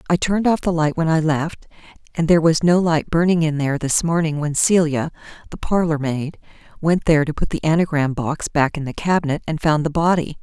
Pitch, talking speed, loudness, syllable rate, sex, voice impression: 160 Hz, 220 wpm, -19 LUFS, 5.7 syllables/s, female, feminine, adult-like, tensed, slightly powerful, clear, fluent, intellectual, calm, reassuring, elegant, kind, slightly modest